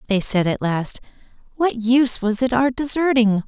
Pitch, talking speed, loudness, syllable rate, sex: 235 Hz, 175 wpm, -19 LUFS, 4.8 syllables/s, female